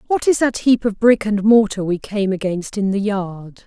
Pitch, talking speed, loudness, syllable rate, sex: 205 Hz, 230 wpm, -17 LUFS, 4.7 syllables/s, female